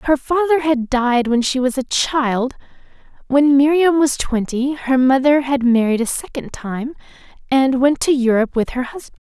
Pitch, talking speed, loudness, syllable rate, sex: 265 Hz, 175 wpm, -17 LUFS, 4.6 syllables/s, female